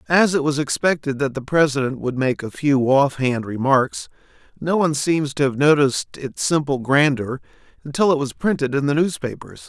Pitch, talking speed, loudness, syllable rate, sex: 140 Hz, 180 wpm, -20 LUFS, 5.2 syllables/s, male